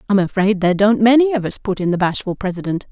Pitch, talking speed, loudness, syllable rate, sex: 200 Hz, 245 wpm, -17 LUFS, 6.6 syllables/s, female